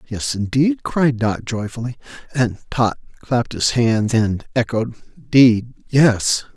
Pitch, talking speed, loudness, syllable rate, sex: 120 Hz, 130 wpm, -18 LUFS, 3.6 syllables/s, male